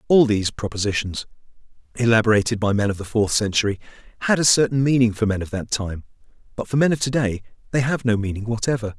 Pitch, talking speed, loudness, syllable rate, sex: 115 Hz, 200 wpm, -21 LUFS, 6.6 syllables/s, male